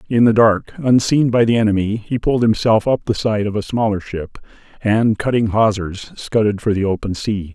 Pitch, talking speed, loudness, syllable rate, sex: 110 Hz, 200 wpm, -17 LUFS, 5.1 syllables/s, male